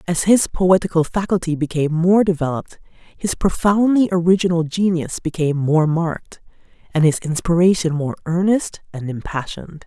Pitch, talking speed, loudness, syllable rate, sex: 170 Hz, 130 wpm, -18 LUFS, 5.3 syllables/s, female